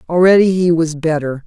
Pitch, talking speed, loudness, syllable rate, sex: 165 Hz, 165 wpm, -14 LUFS, 5.4 syllables/s, female